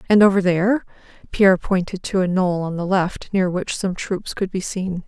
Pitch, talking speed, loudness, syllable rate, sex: 185 Hz, 215 wpm, -20 LUFS, 5.0 syllables/s, female